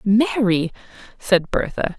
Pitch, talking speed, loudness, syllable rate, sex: 210 Hz, 90 wpm, -20 LUFS, 3.5 syllables/s, female